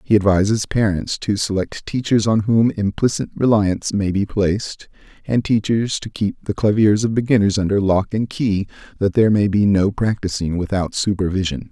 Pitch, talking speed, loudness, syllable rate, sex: 105 Hz, 170 wpm, -18 LUFS, 5.1 syllables/s, male